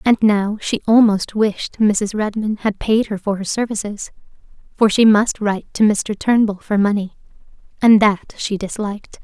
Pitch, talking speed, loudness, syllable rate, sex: 210 Hz, 170 wpm, -17 LUFS, 4.6 syllables/s, female